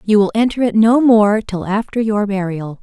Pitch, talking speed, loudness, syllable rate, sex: 210 Hz, 210 wpm, -15 LUFS, 4.8 syllables/s, female